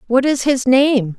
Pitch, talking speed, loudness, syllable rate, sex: 255 Hz, 200 wpm, -15 LUFS, 4.0 syllables/s, female